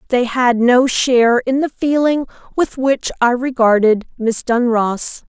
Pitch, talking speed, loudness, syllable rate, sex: 250 Hz, 145 wpm, -15 LUFS, 4.0 syllables/s, female